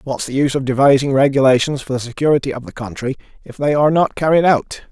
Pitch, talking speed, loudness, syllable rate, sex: 140 Hz, 220 wpm, -16 LUFS, 6.6 syllables/s, male